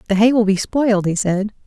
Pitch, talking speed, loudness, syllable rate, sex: 210 Hz, 250 wpm, -17 LUFS, 5.9 syllables/s, female